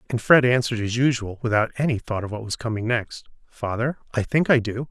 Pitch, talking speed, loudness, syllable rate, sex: 120 Hz, 220 wpm, -22 LUFS, 5.9 syllables/s, male